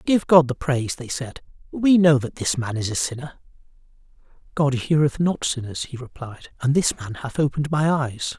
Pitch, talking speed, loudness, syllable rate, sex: 140 Hz, 195 wpm, -21 LUFS, 5.0 syllables/s, male